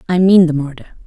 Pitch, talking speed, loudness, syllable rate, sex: 170 Hz, 225 wpm, -12 LUFS, 7.1 syllables/s, female